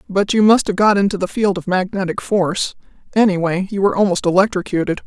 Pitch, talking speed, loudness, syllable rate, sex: 190 Hz, 190 wpm, -17 LUFS, 6.3 syllables/s, female